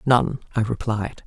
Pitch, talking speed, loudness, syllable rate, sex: 115 Hz, 140 wpm, -23 LUFS, 4.1 syllables/s, female